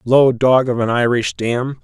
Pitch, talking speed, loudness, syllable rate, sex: 125 Hz, 195 wpm, -16 LUFS, 4.1 syllables/s, male